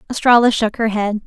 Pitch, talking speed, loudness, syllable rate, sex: 225 Hz, 190 wpm, -15 LUFS, 5.8 syllables/s, female